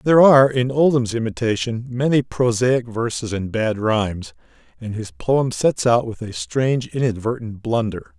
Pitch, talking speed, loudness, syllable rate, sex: 120 Hz, 155 wpm, -19 LUFS, 4.7 syllables/s, male